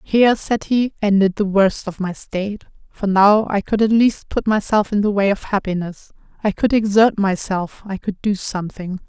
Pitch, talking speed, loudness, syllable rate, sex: 200 Hz, 200 wpm, -18 LUFS, 4.9 syllables/s, female